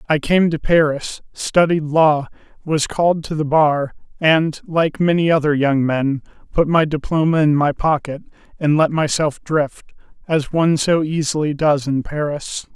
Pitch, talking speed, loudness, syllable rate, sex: 155 Hz, 160 wpm, -18 LUFS, 4.4 syllables/s, male